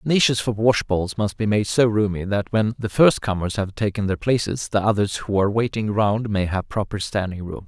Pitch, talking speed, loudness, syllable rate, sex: 105 Hz, 220 wpm, -21 LUFS, 5.2 syllables/s, male